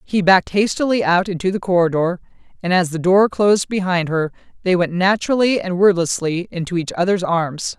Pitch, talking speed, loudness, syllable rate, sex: 185 Hz, 175 wpm, -17 LUFS, 5.5 syllables/s, female